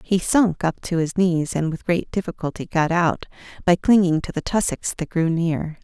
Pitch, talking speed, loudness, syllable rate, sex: 170 Hz, 205 wpm, -21 LUFS, 4.9 syllables/s, female